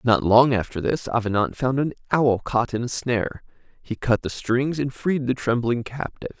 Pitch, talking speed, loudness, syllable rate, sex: 120 Hz, 195 wpm, -23 LUFS, 5.0 syllables/s, male